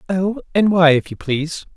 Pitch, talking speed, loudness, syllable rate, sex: 170 Hz, 205 wpm, -17 LUFS, 5.2 syllables/s, male